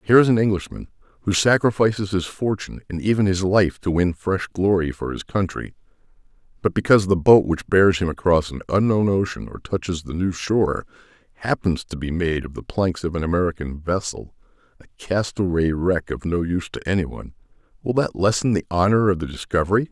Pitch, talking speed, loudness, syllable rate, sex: 95 Hz, 185 wpm, -21 LUFS, 5.7 syllables/s, male